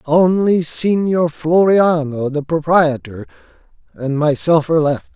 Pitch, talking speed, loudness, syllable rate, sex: 155 Hz, 105 wpm, -15 LUFS, 4.0 syllables/s, male